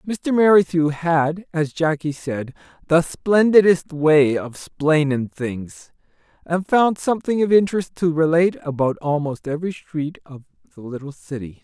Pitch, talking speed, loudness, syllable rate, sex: 160 Hz, 140 wpm, -19 LUFS, 4.5 syllables/s, male